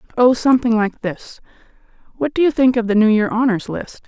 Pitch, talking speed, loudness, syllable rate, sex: 235 Hz, 205 wpm, -17 LUFS, 5.8 syllables/s, female